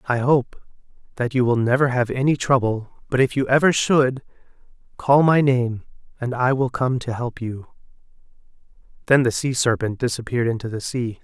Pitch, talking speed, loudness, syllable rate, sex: 125 Hz, 170 wpm, -20 LUFS, 5.1 syllables/s, male